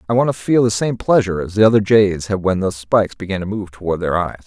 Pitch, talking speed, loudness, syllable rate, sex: 100 Hz, 280 wpm, -17 LUFS, 6.7 syllables/s, male